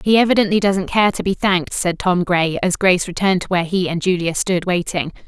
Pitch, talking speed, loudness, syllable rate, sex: 185 Hz, 225 wpm, -17 LUFS, 6.0 syllables/s, female